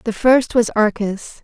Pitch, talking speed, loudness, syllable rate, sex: 230 Hz, 165 wpm, -17 LUFS, 3.8 syllables/s, female